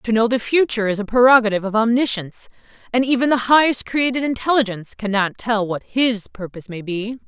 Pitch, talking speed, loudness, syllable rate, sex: 230 Hz, 180 wpm, -18 LUFS, 6.1 syllables/s, female